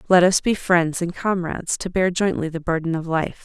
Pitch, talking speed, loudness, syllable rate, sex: 175 Hz, 225 wpm, -21 LUFS, 5.2 syllables/s, female